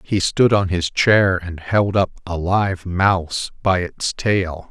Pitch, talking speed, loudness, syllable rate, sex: 90 Hz, 180 wpm, -19 LUFS, 3.4 syllables/s, male